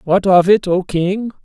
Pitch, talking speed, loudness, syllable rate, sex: 190 Hz, 210 wpm, -14 LUFS, 4.1 syllables/s, male